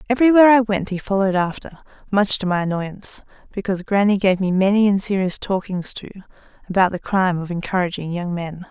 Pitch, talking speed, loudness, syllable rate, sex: 195 Hz, 180 wpm, -19 LUFS, 6.2 syllables/s, female